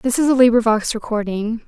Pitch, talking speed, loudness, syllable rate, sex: 230 Hz, 180 wpm, -17 LUFS, 5.7 syllables/s, female